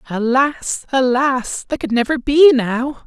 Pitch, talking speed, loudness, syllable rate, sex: 260 Hz, 135 wpm, -16 LUFS, 3.6 syllables/s, male